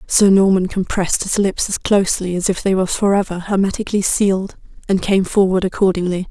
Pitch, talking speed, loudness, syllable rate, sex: 190 Hz, 170 wpm, -17 LUFS, 5.9 syllables/s, female